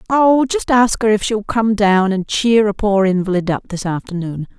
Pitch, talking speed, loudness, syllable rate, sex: 210 Hz, 225 wpm, -16 LUFS, 4.9 syllables/s, female